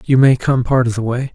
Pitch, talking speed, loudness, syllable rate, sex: 125 Hz, 310 wpm, -15 LUFS, 5.7 syllables/s, male